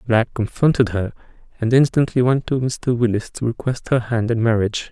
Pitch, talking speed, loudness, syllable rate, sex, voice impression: 120 Hz, 195 wpm, -19 LUFS, 5.7 syllables/s, male, masculine, adult-like, slightly relaxed, slightly weak, soft, cool, intellectual, calm, friendly, slightly wild, kind, slightly modest